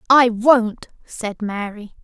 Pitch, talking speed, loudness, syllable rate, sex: 225 Hz, 120 wpm, -18 LUFS, 3.1 syllables/s, female